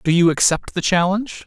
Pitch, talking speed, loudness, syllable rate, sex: 180 Hz, 205 wpm, -18 LUFS, 5.8 syllables/s, male